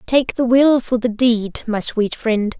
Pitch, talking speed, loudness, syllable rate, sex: 235 Hz, 210 wpm, -17 LUFS, 3.8 syllables/s, female